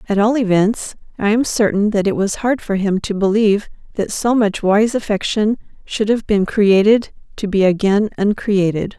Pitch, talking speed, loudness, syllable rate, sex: 205 Hz, 180 wpm, -16 LUFS, 4.8 syllables/s, female